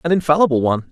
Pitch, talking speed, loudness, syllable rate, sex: 145 Hz, 200 wpm, -16 LUFS, 8.6 syllables/s, male